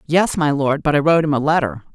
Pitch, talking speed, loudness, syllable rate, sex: 150 Hz, 275 wpm, -17 LUFS, 6.4 syllables/s, female